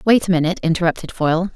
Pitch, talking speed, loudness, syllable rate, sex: 170 Hz, 195 wpm, -18 LUFS, 7.9 syllables/s, female